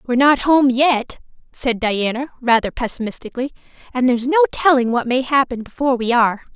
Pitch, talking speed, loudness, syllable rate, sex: 255 Hz, 165 wpm, -17 LUFS, 6.0 syllables/s, female